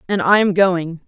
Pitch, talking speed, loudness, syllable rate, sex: 185 Hz, 225 wpm, -16 LUFS, 4.6 syllables/s, female